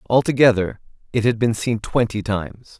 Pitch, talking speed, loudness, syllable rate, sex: 115 Hz, 150 wpm, -20 LUFS, 5.1 syllables/s, male